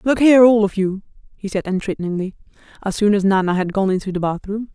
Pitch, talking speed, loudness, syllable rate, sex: 200 Hz, 215 wpm, -18 LUFS, 6.2 syllables/s, female